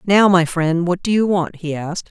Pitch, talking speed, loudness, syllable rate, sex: 175 Hz, 255 wpm, -17 LUFS, 5.1 syllables/s, female